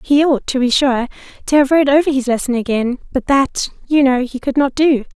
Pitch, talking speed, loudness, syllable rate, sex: 265 Hz, 230 wpm, -15 LUFS, 5.4 syllables/s, female